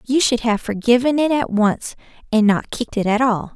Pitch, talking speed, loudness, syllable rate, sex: 230 Hz, 220 wpm, -18 LUFS, 5.3 syllables/s, female